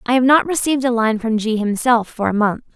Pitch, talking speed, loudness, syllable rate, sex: 235 Hz, 260 wpm, -17 LUFS, 5.9 syllables/s, female